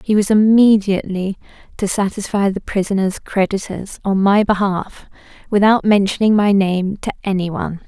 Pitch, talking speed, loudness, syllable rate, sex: 200 Hz, 135 wpm, -16 LUFS, 5.1 syllables/s, female